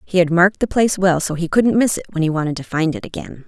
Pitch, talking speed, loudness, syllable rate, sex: 175 Hz, 310 wpm, -17 LUFS, 6.8 syllables/s, female